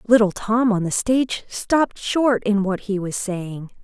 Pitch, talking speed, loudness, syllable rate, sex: 210 Hz, 190 wpm, -21 LUFS, 4.2 syllables/s, female